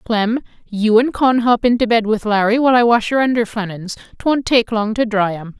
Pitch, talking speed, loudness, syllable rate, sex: 225 Hz, 215 wpm, -16 LUFS, 5.2 syllables/s, female